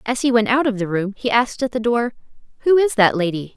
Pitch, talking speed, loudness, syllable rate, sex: 230 Hz, 270 wpm, -18 LUFS, 6.2 syllables/s, female